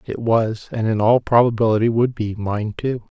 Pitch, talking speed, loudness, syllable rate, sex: 115 Hz, 190 wpm, -19 LUFS, 4.8 syllables/s, male